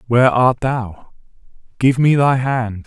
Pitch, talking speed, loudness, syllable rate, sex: 125 Hz, 145 wpm, -16 LUFS, 4.0 syllables/s, male